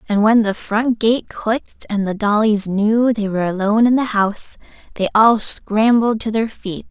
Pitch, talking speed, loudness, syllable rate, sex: 215 Hz, 190 wpm, -17 LUFS, 4.6 syllables/s, female